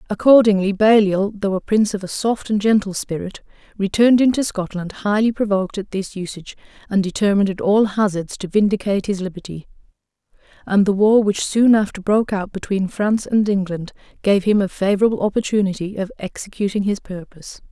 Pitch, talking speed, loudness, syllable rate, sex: 200 Hz, 165 wpm, -18 LUFS, 5.9 syllables/s, female